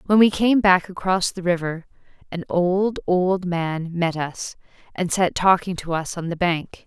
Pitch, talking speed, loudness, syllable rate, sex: 180 Hz, 185 wpm, -21 LUFS, 4.2 syllables/s, female